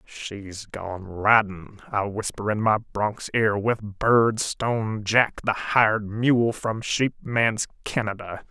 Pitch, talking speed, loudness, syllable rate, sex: 110 Hz, 135 wpm, -23 LUFS, 3.4 syllables/s, male